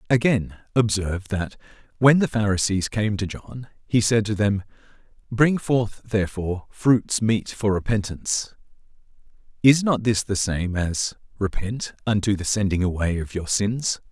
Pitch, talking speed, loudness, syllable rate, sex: 105 Hz, 145 wpm, -23 LUFS, 4.4 syllables/s, male